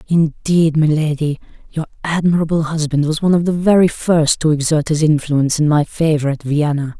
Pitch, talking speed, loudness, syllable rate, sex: 155 Hz, 170 wpm, -16 LUFS, 5.3 syllables/s, female